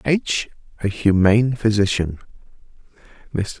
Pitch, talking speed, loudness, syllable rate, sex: 110 Hz, 85 wpm, -19 LUFS, 4.6 syllables/s, male